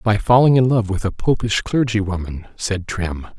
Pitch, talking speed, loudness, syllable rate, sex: 105 Hz, 195 wpm, -18 LUFS, 4.7 syllables/s, male